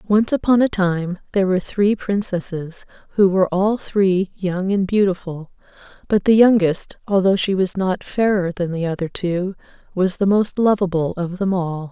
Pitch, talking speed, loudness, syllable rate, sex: 190 Hz, 170 wpm, -19 LUFS, 4.7 syllables/s, female